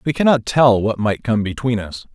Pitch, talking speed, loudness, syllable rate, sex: 115 Hz, 225 wpm, -17 LUFS, 5.1 syllables/s, male